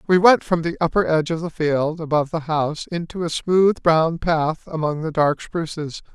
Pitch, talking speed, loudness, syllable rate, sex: 160 Hz, 205 wpm, -20 LUFS, 5.0 syllables/s, male